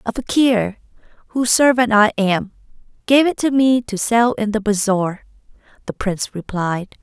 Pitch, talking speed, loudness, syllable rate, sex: 220 Hz, 155 wpm, -17 LUFS, 4.7 syllables/s, female